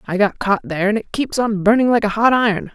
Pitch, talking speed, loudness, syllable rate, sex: 210 Hz, 285 wpm, -17 LUFS, 6.2 syllables/s, female